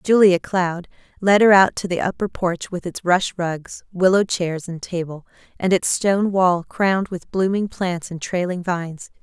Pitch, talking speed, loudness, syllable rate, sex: 180 Hz, 180 wpm, -20 LUFS, 4.5 syllables/s, female